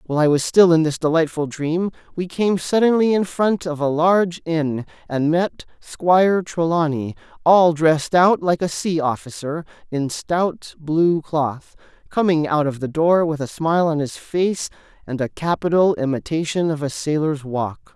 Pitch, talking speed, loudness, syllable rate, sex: 160 Hz, 170 wpm, -19 LUFS, 4.5 syllables/s, male